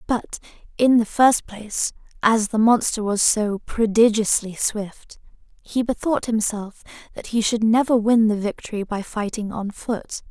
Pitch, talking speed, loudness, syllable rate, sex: 220 Hz, 150 wpm, -21 LUFS, 4.3 syllables/s, female